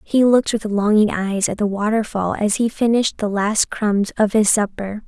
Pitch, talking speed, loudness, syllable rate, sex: 210 Hz, 200 wpm, -18 LUFS, 4.9 syllables/s, female